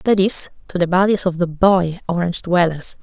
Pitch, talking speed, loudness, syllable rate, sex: 180 Hz, 200 wpm, -17 LUFS, 5.3 syllables/s, female